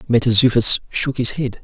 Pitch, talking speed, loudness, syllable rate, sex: 120 Hz, 145 wpm, -15 LUFS, 5.2 syllables/s, male